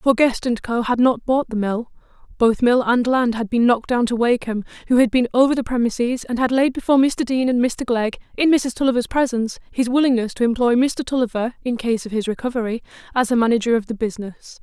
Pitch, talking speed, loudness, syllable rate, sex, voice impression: 240 Hz, 225 wpm, -19 LUFS, 6.1 syllables/s, female, feminine, adult-like, tensed, powerful, bright, slightly raspy, intellectual, friendly, lively, intense